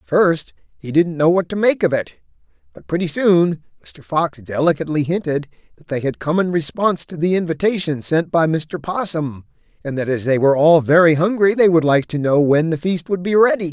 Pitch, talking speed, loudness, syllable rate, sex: 160 Hz, 215 wpm, -17 LUFS, 5.3 syllables/s, male